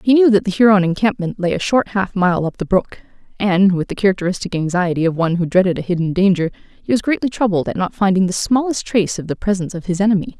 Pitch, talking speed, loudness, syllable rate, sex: 190 Hz, 240 wpm, -17 LUFS, 6.7 syllables/s, female